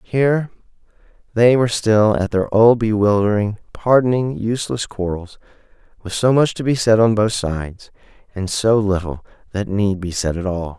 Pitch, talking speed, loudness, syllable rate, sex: 105 Hz, 160 wpm, -18 LUFS, 5.0 syllables/s, male